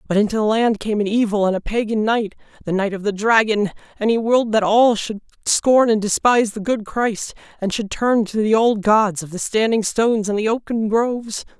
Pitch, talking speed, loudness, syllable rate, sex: 215 Hz, 225 wpm, -18 LUFS, 5.3 syllables/s, male